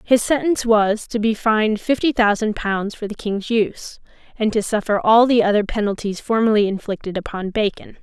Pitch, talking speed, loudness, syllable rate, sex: 215 Hz, 180 wpm, -19 LUFS, 5.3 syllables/s, female